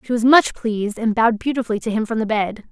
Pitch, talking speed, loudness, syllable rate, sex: 225 Hz, 265 wpm, -19 LUFS, 6.6 syllables/s, female